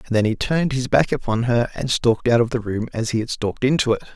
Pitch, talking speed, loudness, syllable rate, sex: 120 Hz, 290 wpm, -20 LUFS, 6.7 syllables/s, male